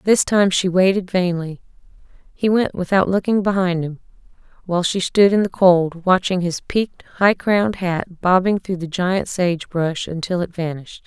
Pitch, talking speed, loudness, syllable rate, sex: 185 Hz, 170 wpm, -19 LUFS, 4.9 syllables/s, female